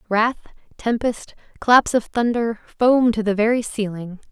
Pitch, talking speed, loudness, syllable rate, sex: 225 Hz, 140 wpm, -20 LUFS, 4.4 syllables/s, female